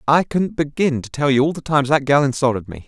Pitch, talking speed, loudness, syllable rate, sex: 140 Hz, 270 wpm, -18 LUFS, 6.2 syllables/s, male